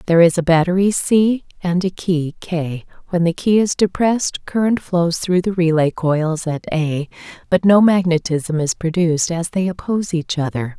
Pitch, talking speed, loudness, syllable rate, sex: 175 Hz, 180 wpm, -18 LUFS, 4.7 syllables/s, female